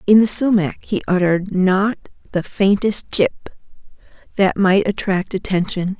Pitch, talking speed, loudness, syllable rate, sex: 195 Hz, 130 wpm, -17 LUFS, 4.3 syllables/s, female